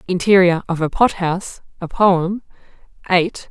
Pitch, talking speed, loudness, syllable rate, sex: 180 Hz, 120 wpm, -17 LUFS, 4.5 syllables/s, female